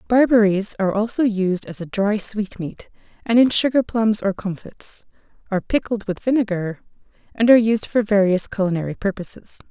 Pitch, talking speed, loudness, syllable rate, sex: 210 Hz, 150 wpm, -20 LUFS, 5.3 syllables/s, female